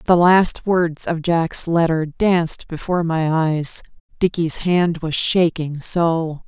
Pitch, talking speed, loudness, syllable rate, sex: 165 Hz, 140 wpm, -18 LUFS, 3.5 syllables/s, female